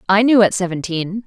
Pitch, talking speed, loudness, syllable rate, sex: 195 Hz, 190 wpm, -16 LUFS, 5.5 syllables/s, female